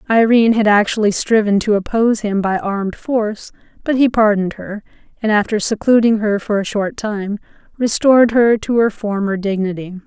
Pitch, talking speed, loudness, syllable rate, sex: 215 Hz, 165 wpm, -16 LUFS, 5.3 syllables/s, female